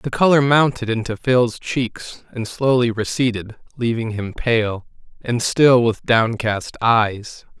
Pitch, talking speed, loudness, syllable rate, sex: 120 Hz, 135 wpm, -18 LUFS, 3.7 syllables/s, male